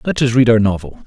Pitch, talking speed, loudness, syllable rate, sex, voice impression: 115 Hz, 280 wpm, -14 LUFS, 6.3 syllables/s, male, masculine, very adult-like, slightly thick, slightly fluent, cool, slightly refreshing, slightly wild